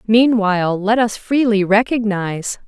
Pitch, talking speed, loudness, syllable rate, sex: 215 Hz, 110 wpm, -16 LUFS, 4.4 syllables/s, female